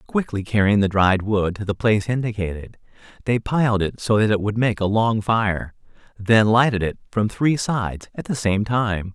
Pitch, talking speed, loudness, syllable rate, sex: 105 Hz, 195 wpm, -20 LUFS, 4.9 syllables/s, male